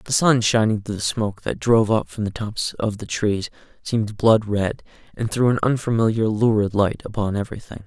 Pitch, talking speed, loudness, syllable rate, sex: 110 Hz, 200 wpm, -21 LUFS, 5.3 syllables/s, male